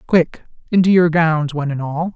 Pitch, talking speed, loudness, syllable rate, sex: 165 Hz, 195 wpm, -17 LUFS, 5.1 syllables/s, female